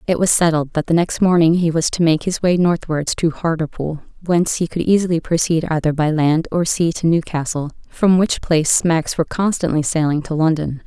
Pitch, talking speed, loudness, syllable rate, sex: 165 Hz, 205 wpm, -17 LUFS, 5.4 syllables/s, female